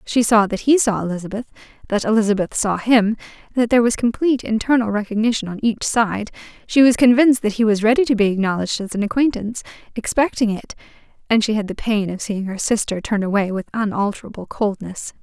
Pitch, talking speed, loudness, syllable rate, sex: 220 Hz, 190 wpm, -19 LUFS, 6.1 syllables/s, female